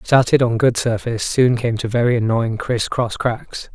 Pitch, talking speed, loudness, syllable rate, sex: 120 Hz, 190 wpm, -18 LUFS, 4.7 syllables/s, male